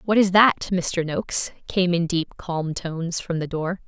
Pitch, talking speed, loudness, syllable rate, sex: 175 Hz, 200 wpm, -22 LUFS, 4.4 syllables/s, female